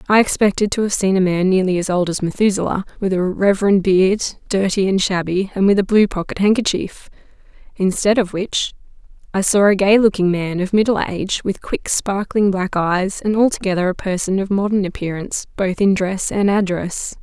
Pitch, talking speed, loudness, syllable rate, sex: 195 Hz, 190 wpm, -17 LUFS, 5.3 syllables/s, female